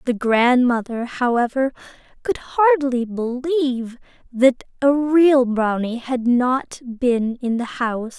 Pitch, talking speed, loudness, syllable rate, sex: 250 Hz, 115 wpm, -19 LUFS, 3.6 syllables/s, female